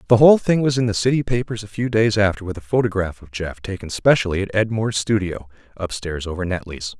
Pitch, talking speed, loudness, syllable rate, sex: 105 Hz, 225 wpm, -20 LUFS, 5.7 syllables/s, male